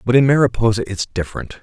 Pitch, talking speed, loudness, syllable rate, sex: 115 Hz, 185 wpm, -17 LUFS, 6.7 syllables/s, male